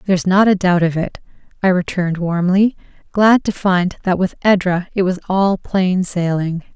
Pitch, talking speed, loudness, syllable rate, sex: 185 Hz, 180 wpm, -16 LUFS, 4.8 syllables/s, female